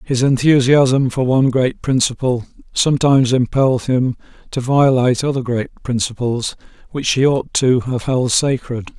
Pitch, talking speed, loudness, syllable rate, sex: 130 Hz, 140 wpm, -16 LUFS, 4.7 syllables/s, male